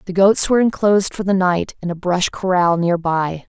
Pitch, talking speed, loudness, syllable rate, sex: 185 Hz, 220 wpm, -17 LUFS, 5.2 syllables/s, female